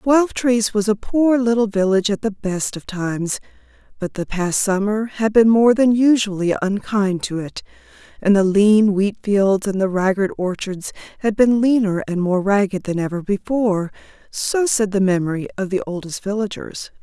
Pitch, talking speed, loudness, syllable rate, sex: 205 Hz, 175 wpm, -18 LUFS, 4.8 syllables/s, female